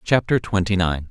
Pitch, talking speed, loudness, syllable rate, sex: 95 Hz, 165 wpm, -20 LUFS, 5.0 syllables/s, male